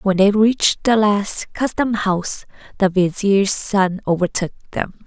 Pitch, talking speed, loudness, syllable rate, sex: 200 Hz, 140 wpm, -18 LUFS, 4.2 syllables/s, female